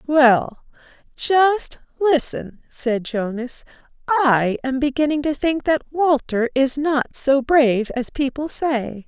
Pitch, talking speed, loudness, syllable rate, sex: 275 Hz, 125 wpm, -19 LUFS, 3.5 syllables/s, female